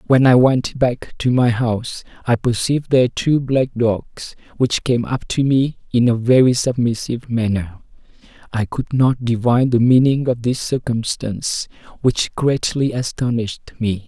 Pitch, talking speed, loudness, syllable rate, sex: 120 Hz, 155 wpm, -18 LUFS, 4.6 syllables/s, male